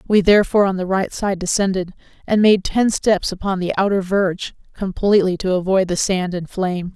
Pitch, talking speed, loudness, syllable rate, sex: 190 Hz, 190 wpm, -18 LUFS, 5.7 syllables/s, female